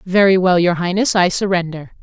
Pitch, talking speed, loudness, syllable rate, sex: 180 Hz, 180 wpm, -15 LUFS, 5.4 syllables/s, female